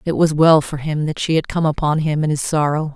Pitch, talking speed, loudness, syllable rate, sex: 150 Hz, 285 wpm, -17 LUFS, 5.6 syllables/s, female